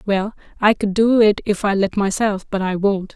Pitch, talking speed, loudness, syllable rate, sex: 205 Hz, 230 wpm, -18 LUFS, 4.8 syllables/s, female